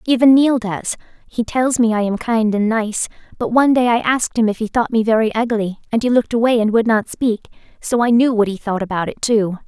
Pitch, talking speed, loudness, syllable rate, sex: 225 Hz, 250 wpm, -17 LUFS, 5.8 syllables/s, female